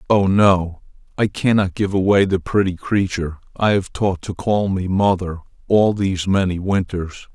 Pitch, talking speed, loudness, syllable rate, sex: 95 Hz, 165 wpm, -19 LUFS, 4.6 syllables/s, male